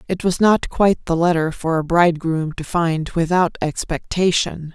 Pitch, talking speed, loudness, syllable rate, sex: 170 Hz, 165 wpm, -19 LUFS, 4.6 syllables/s, female